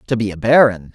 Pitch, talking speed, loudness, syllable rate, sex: 105 Hz, 255 wpm, -15 LUFS, 6.2 syllables/s, male